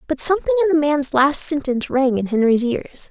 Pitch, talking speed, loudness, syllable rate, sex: 285 Hz, 210 wpm, -18 LUFS, 5.8 syllables/s, female